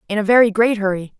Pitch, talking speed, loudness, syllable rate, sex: 210 Hz, 250 wpm, -16 LUFS, 7.1 syllables/s, female